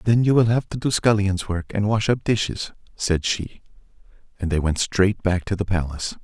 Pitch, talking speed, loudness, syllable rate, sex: 100 Hz, 210 wpm, -22 LUFS, 5.2 syllables/s, male